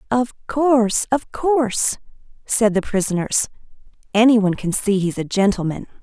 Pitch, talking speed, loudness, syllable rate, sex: 220 Hz, 120 wpm, -19 LUFS, 4.9 syllables/s, female